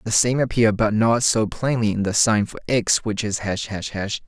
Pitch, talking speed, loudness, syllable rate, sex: 110 Hz, 240 wpm, -20 LUFS, 4.8 syllables/s, male